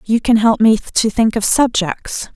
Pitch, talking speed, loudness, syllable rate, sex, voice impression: 220 Hz, 205 wpm, -15 LUFS, 4.0 syllables/s, female, feminine, adult-like, tensed, slightly dark, slightly hard, fluent, intellectual, calm, elegant, sharp